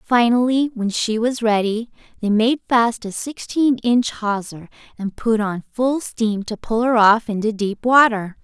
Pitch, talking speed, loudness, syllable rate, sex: 225 Hz, 170 wpm, -19 LUFS, 4.1 syllables/s, female